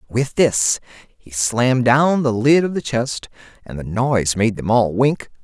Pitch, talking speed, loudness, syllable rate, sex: 120 Hz, 190 wpm, -18 LUFS, 4.2 syllables/s, male